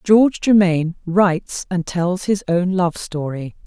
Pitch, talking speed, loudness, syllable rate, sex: 180 Hz, 145 wpm, -18 LUFS, 4.2 syllables/s, female